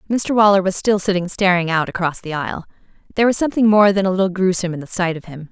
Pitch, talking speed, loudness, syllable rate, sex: 190 Hz, 250 wpm, -17 LUFS, 7.1 syllables/s, female